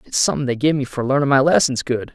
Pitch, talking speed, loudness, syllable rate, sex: 130 Hz, 280 wpm, -18 LUFS, 6.8 syllables/s, male